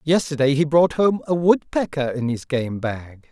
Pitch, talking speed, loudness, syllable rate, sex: 145 Hz, 180 wpm, -20 LUFS, 4.5 syllables/s, male